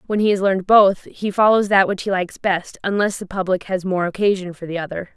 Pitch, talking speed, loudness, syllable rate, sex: 190 Hz, 245 wpm, -19 LUFS, 5.9 syllables/s, female